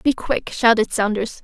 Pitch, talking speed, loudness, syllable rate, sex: 225 Hz, 165 wpm, -19 LUFS, 4.3 syllables/s, female